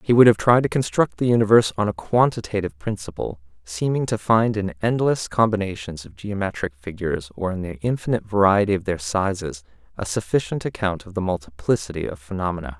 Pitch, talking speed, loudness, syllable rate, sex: 100 Hz, 175 wpm, -22 LUFS, 6.1 syllables/s, male